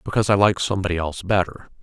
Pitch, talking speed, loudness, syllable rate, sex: 95 Hz, 200 wpm, -21 LUFS, 8.0 syllables/s, male